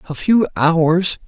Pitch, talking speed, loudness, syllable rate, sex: 170 Hz, 140 wpm, -16 LUFS, 3.2 syllables/s, male